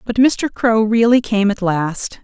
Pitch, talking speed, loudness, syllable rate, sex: 220 Hz, 190 wpm, -16 LUFS, 3.9 syllables/s, female